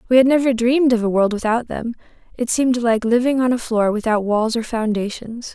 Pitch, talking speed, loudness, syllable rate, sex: 235 Hz, 215 wpm, -18 LUFS, 5.7 syllables/s, female